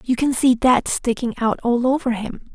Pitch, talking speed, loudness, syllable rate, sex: 245 Hz, 210 wpm, -19 LUFS, 4.6 syllables/s, female